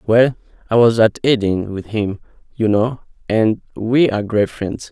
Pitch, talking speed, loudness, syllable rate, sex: 110 Hz, 170 wpm, -17 LUFS, 4.4 syllables/s, male